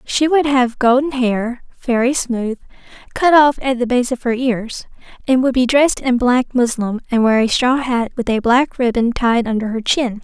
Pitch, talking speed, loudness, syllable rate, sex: 245 Hz, 205 wpm, -16 LUFS, 4.7 syllables/s, female